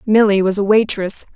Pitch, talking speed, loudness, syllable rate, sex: 205 Hz, 180 wpm, -15 LUFS, 5.2 syllables/s, female